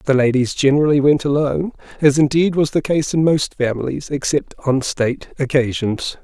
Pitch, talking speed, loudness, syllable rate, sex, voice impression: 140 Hz, 165 wpm, -17 LUFS, 5.3 syllables/s, male, masculine, very adult-like, slightly cool, intellectual, elegant